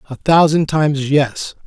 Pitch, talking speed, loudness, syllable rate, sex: 145 Hz, 145 wpm, -15 LUFS, 4.3 syllables/s, male